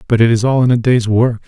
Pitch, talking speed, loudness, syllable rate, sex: 120 Hz, 325 wpm, -13 LUFS, 6.2 syllables/s, male